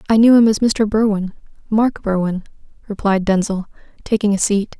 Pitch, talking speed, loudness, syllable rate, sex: 205 Hz, 150 wpm, -17 LUFS, 5.3 syllables/s, female